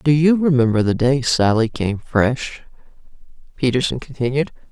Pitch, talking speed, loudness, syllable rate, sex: 130 Hz, 125 wpm, -18 LUFS, 4.8 syllables/s, female